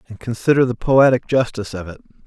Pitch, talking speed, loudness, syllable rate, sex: 115 Hz, 185 wpm, -17 LUFS, 6.5 syllables/s, male